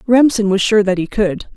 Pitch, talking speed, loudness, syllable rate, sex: 205 Hz, 230 wpm, -15 LUFS, 5.0 syllables/s, female